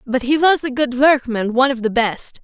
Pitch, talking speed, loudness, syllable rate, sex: 260 Hz, 220 wpm, -16 LUFS, 5.2 syllables/s, female